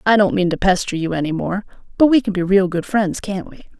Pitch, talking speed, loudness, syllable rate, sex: 195 Hz, 270 wpm, -18 LUFS, 5.9 syllables/s, female